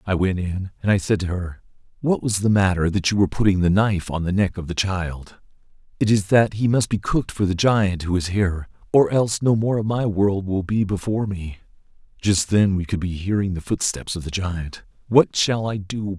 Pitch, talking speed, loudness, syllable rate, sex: 100 Hz, 235 wpm, -21 LUFS, 5.3 syllables/s, male